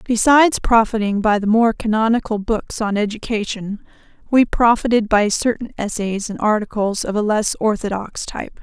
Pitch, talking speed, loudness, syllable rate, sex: 215 Hz, 145 wpm, -18 LUFS, 5.0 syllables/s, female